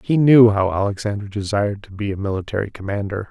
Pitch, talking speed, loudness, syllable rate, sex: 105 Hz, 180 wpm, -19 LUFS, 6.3 syllables/s, male